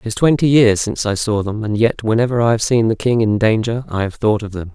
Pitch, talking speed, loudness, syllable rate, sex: 110 Hz, 290 wpm, -16 LUFS, 6.0 syllables/s, male